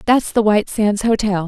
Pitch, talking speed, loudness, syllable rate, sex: 210 Hz, 205 wpm, -16 LUFS, 5.3 syllables/s, female